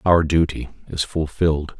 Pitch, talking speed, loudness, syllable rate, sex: 80 Hz, 135 wpm, -21 LUFS, 4.6 syllables/s, male